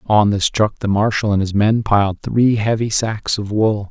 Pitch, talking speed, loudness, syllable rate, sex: 105 Hz, 215 wpm, -17 LUFS, 4.5 syllables/s, male